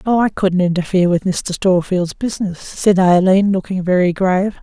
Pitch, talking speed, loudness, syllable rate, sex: 185 Hz, 155 wpm, -16 LUFS, 5.2 syllables/s, female